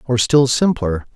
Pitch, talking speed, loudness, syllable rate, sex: 125 Hz, 155 wpm, -16 LUFS, 4.1 syllables/s, male